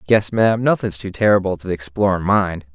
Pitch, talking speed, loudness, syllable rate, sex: 100 Hz, 195 wpm, -18 LUFS, 5.9 syllables/s, male